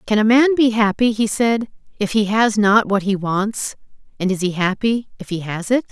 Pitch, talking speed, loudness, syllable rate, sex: 215 Hz, 225 wpm, -18 LUFS, 5.0 syllables/s, female